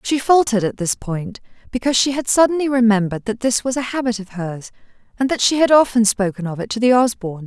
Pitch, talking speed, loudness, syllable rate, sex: 230 Hz, 225 wpm, -18 LUFS, 6.2 syllables/s, female